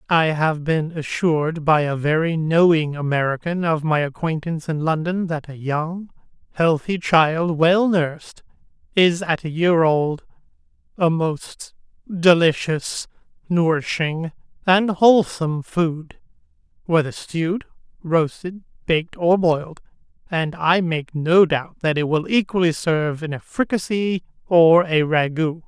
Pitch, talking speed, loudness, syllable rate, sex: 165 Hz, 130 wpm, -20 LUFS, 4.1 syllables/s, male